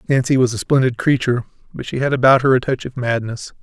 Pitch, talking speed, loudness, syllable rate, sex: 125 Hz, 230 wpm, -17 LUFS, 6.5 syllables/s, male